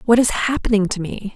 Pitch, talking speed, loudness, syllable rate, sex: 215 Hz, 220 wpm, -19 LUFS, 5.8 syllables/s, female